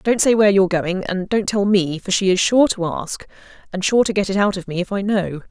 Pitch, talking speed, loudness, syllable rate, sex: 195 Hz, 285 wpm, -18 LUFS, 5.8 syllables/s, female